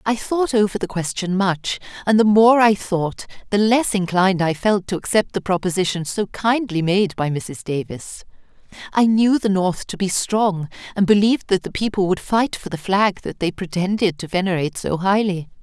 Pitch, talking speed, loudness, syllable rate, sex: 195 Hz, 190 wpm, -19 LUFS, 5.0 syllables/s, female